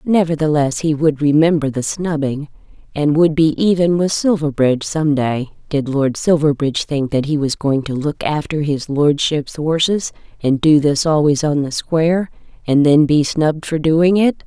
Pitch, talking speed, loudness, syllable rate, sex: 150 Hz, 175 wpm, -16 LUFS, 4.7 syllables/s, female